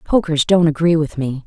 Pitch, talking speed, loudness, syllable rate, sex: 160 Hz, 205 wpm, -16 LUFS, 5.1 syllables/s, female